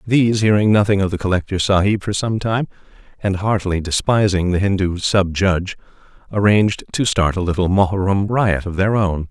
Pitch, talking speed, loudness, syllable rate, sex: 95 Hz, 175 wpm, -17 LUFS, 5.5 syllables/s, male